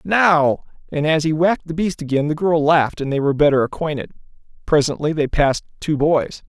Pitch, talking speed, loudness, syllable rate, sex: 155 Hz, 190 wpm, -18 LUFS, 5.8 syllables/s, male